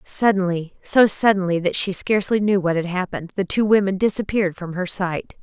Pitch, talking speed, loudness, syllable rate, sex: 190 Hz, 190 wpm, -20 LUFS, 5.6 syllables/s, female